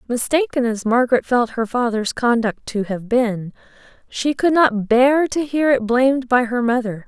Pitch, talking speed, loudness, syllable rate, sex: 245 Hz, 180 wpm, -18 LUFS, 4.6 syllables/s, female